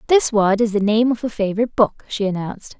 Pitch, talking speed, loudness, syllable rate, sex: 215 Hz, 235 wpm, -18 LUFS, 6.3 syllables/s, female